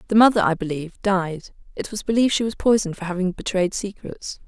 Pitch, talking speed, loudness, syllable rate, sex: 195 Hz, 190 wpm, -22 LUFS, 6.4 syllables/s, female